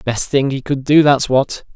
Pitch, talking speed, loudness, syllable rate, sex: 135 Hz, 240 wpm, -15 LUFS, 4.4 syllables/s, male